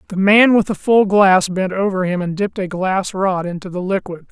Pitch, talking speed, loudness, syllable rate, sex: 190 Hz, 235 wpm, -16 LUFS, 5.2 syllables/s, male